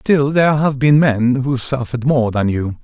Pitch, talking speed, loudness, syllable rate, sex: 130 Hz, 210 wpm, -15 LUFS, 4.7 syllables/s, male